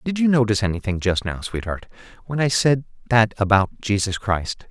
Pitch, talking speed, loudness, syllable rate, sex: 110 Hz, 165 wpm, -21 LUFS, 5.4 syllables/s, male